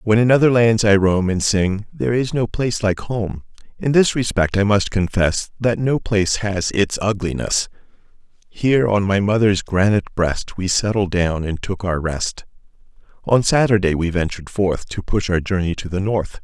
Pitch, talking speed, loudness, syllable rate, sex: 100 Hz, 185 wpm, -18 LUFS, 4.9 syllables/s, male